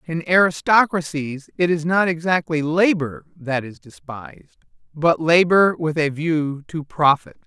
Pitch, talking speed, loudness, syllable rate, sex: 160 Hz, 135 wpm, -19 LUFS, 4.1 syllables/s, male